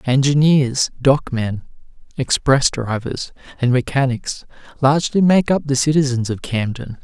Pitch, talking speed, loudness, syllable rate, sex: 135 Hz, 110 wpm, -18 LUFS, 4.4 syllables/s, male